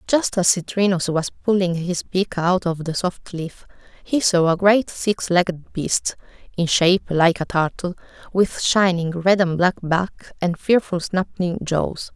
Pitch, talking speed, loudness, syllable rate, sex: 180 Hz, 170 wpm, -20 LUFS, 4.1 syllables/s, female